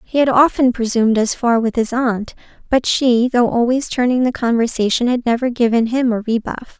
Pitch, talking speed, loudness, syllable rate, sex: 240 Hz, 195 wpm, -16 LUFS, 5.2 syllables/s, female